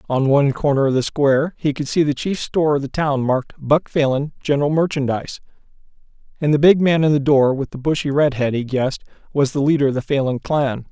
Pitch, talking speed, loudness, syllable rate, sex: 140 Hz, 215 wpm, -18 LUFS, 6.0 syllables/s, male